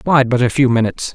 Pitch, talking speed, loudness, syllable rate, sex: 125 Hz, 260 wpm, -15 LUFS, 6.7 syllables/s, male